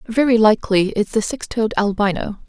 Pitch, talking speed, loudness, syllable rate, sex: 215 Hz, 170 wpm, -18 LUFS, 5.2 syllables/s, female